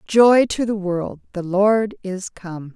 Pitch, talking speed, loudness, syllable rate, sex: 200 Hz, 175 wpm, -19 LUFS, 3.4 syllables/s, female